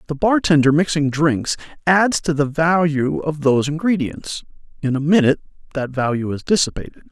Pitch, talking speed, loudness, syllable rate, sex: 155 Hz, 150 wpm, -18 LUFS, 5.4 syllables/s, male